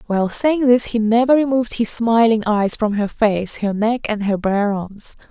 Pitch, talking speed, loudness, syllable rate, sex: 220 Hz, 205 wpm, -17 LUFS, 4.7 syllables/s, female